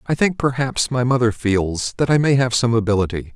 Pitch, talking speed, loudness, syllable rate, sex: 120 Hz, 215 wpm, -18 LUFS, 5.3 syllables/s, male